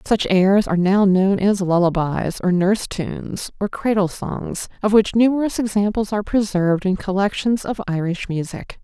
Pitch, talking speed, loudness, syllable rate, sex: 195 Hz, 165 wpm, -19 LUFS, 4.9 syllables/s, female